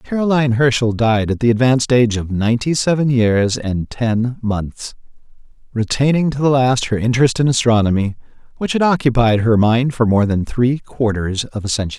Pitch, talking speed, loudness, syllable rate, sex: 120 Hz, 175 wpm, -16 LUFS, 5.3 syllables/s, male